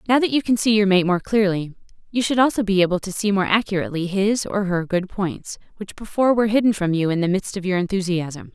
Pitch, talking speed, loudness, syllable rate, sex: 195 Hz, 245 wpm, -20 LUFS, 6.2 syllables/s, female